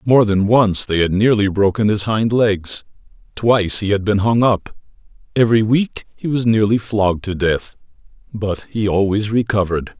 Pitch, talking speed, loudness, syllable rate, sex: 105 Hz, 170 wpm, -17 LUFS, 4.8 syllables/s, male